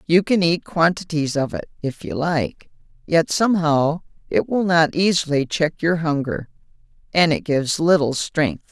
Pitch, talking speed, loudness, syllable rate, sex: 160 Hz, 160 wpm, -20 LUFS, 4.5 syllables/s, female